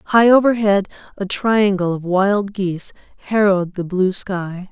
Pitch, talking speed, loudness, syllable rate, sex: 195 Hz, 140 wpm, -17 LUFS, 4.2 syllables/s, female